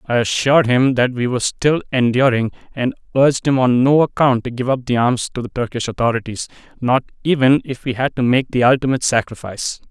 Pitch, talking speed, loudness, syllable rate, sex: 125 Hz, 195 wpm, -17 LUFS, 5.9 syllables/s, male